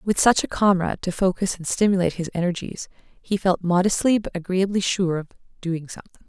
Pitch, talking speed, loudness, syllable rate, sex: 185 Hz, 180 wpm, -22 LUFS, 5.9 syllables/s, female